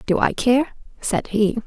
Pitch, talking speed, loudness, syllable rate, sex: 235 Hz, 180 wpm, -21 LUFS, 3.9 syllables/s, female